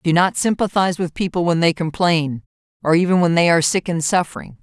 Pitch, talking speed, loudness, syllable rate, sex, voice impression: 170 Hz, 210 wpm, -18 LUFS, 6.0 syllables/s, female, feminine, slightly powerful, clear, intellectual, calm, lively, strict, slightly sharp